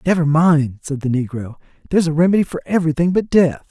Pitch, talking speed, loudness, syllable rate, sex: 160 Hz, 195 wpm, -17 LUFS, 6.4 syllables/s, male